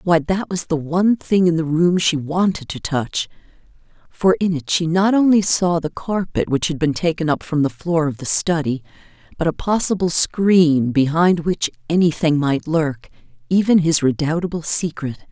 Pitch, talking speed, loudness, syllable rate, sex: 165 Hz, 175 wpm, -18 LUFS, 4.7 syllables/s, female